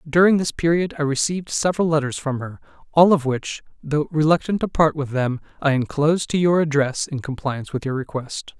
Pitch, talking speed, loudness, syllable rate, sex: 150 Hz, 195 wpm, -21 LUFS, 5.6 syllables/s, male